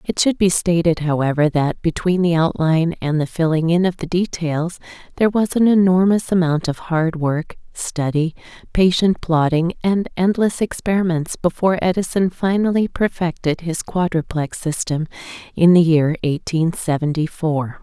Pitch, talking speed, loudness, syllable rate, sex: 170 Hz, 145 wpm, -18 LUFS, 4.7 syllables/s, female